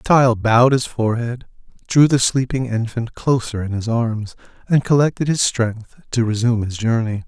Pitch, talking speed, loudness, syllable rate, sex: 120 Hz, 175 wpm, -18 LUFS, 5.0 syllables/s, male